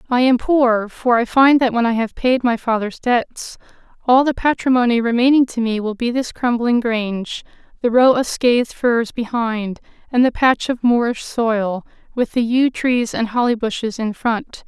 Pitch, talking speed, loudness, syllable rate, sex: 240 Hz, 190 wpm, -17 LUFS, 4.5 syllables/s, female